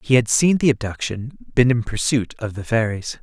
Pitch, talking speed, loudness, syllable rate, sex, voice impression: 120 Hz, 205 wpm, -20 LUFS, 4.9 syllables/s, male, masculine, middle-aged, tensed, powerful, bright, clear, raspy, cool, intellectual, slightly mature, friendly, reassuring, wild, lively, kind